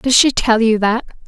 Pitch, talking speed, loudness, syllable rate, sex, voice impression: 230 Hz, 235 wpm, -14 LUFS, 4.9 syllables/s, female, feminine, adult-like, tensed, slightly weak, slightly dark, clear, fluent, intellectual, calm, slightly lively, slightly sharp, modest